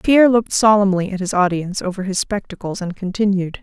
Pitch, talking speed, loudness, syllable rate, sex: 195 Hz, 180 wpm, -18 LUFS, 6.2 syllables/s, female